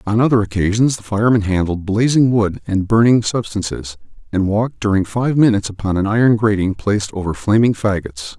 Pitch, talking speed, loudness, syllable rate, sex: 105 Hz, 170 wpm, -16 LUFS, 5.8 syllables/s, male